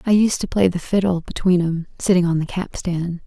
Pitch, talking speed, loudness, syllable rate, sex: 180 Hz, 220 wpm, -20 LUFS, 5.4 syllables/s, female